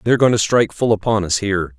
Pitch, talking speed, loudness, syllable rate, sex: 105 Hz, 270 wpm, -17 LUFS, 7.2 syllables/s, male